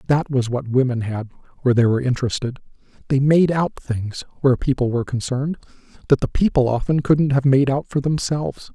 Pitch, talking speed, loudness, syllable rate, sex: 135 Hz, 185 wpm, -20 LUFS, 6.0 syllables/s, male